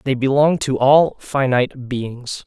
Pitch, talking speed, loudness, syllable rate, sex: 135 Hz, 145 wpm, -17 LUFS, 4.0 syllables/s, male